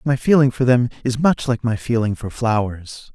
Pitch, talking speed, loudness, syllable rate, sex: 120 Hz, 210 wpm, -18 LUFS, 4.9 syllables/s, male